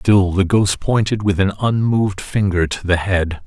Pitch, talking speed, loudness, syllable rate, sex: 95 Hz, 190 wpm, -17 LUFS, 4.5 syllables/s, male